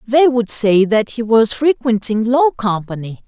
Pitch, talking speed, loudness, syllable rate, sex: 230 Hz, 165 wpm, -15 LUFS, 4.1 syllables/s, female